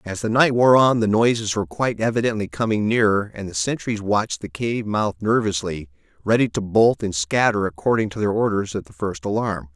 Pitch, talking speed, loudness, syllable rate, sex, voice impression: 110 Hz, 205 wpm, -20 LUFS, 5.5 syllables/s, male, masculine, adult-like, cool, sincere, slightly calm, slightly elegant